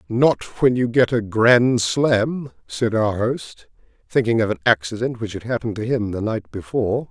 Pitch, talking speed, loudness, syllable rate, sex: 115 Hz, 185 wpm, -20 LUFS, 4.6 syllables/s, male